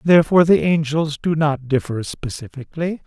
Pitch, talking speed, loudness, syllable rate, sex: 150 Hz, 135 wpm, -18 LUFS, 5.4 syllables/s, male